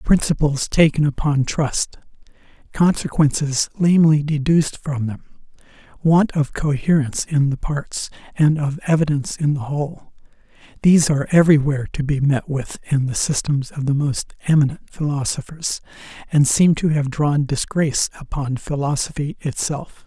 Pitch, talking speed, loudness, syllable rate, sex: 145 Hz, 140 wpm, -19 LUFS, 5.0 syllables/s, male